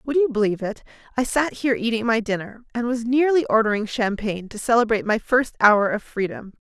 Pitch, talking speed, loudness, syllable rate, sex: 230 Hz, 200 wpm, -21 LUFS, 5.9 syllables/s, female